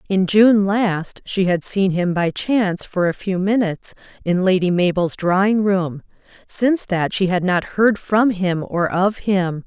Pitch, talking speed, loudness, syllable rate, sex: 190 Hz, 180 wpm, -18 LUFS, 4.1 syllables/s, female